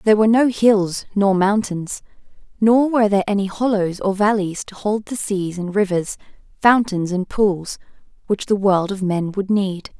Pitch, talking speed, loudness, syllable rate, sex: 200 Hz, 175 wpm, -19 LUFS, 4.7 syllables/s, female